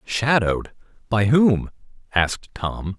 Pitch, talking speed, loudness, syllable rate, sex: 110 Hz, 100 wpm, -21 LUFS, 3.9 syllables/s, male